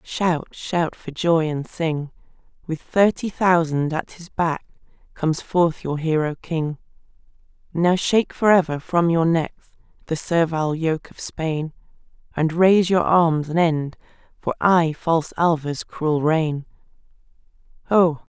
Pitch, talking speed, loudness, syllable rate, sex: 165 Hz, 135 wpm, -21 LUFS, 4.0 syllables/s, female